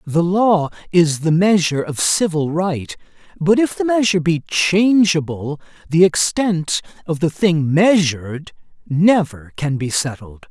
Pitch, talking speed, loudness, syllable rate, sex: 165 Hz, 135 wpm, -17 LUFS, 4.1 syllables/s, male